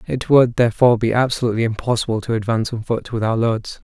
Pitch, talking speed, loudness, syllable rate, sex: 115 Hz, 200 wpm, -18 LUFS, 6.7 syllables/s, male